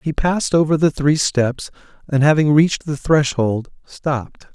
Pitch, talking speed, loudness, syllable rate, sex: 145 Hz, 160 wpm, -17 LUFS, 4.6 syllables/s, male